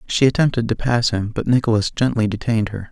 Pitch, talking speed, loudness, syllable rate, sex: 115 Hz, 205 wpm, -19 LUFS, 6.2 syllables/s, male